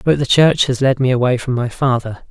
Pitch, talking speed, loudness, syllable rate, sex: 130 Hz, 260 wpm, -15 LUFS, 5.5 syllables/s, male